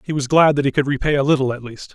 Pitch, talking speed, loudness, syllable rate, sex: 140 Hz, 340 wpm, -17 LUFS, 7.1 syllables/s, male